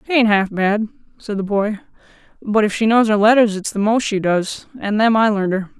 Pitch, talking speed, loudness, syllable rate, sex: 210 Hz, 230 wpm, -17 LUFS, 5.5 syllables/s, female